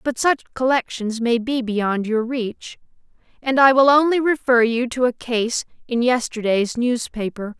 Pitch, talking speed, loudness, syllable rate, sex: 245 Hz, 160 wpm, -19 LUFS, 4.3 syllables/s, female